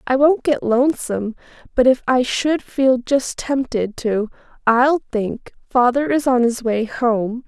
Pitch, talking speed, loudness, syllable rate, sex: 250 Hz, 160 wpm, -18 LUFS, 4.0 syllables/s, female